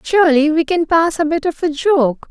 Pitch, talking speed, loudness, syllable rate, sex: 315 Hz, 235 wpm, -15 LUFS, 5.7 syllables/s, female